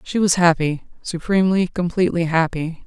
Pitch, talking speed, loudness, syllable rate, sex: 175 Hz, 105 wpm, -19 LUFS, 5.3 syllables/s, female